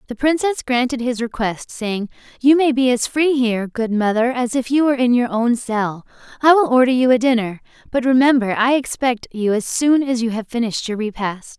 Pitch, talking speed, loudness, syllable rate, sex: 245 Hz, 210 wpm, -18 LUFS, 5.4 syllables/s, female